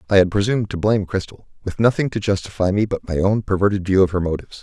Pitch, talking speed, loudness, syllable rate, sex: 95 Hz, 245 wpm, -19 LUFS, 7.0 syllables/s, male